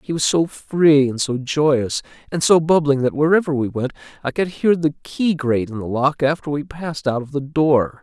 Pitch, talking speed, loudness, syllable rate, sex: 145 Hz, 225 wpm, -19 LUFS, 5.0 syllables/s, male